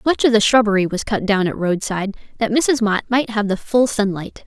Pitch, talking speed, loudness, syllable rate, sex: 215 Hz, 230 wpm, -18 LUFS, 5.4 syllables/s, female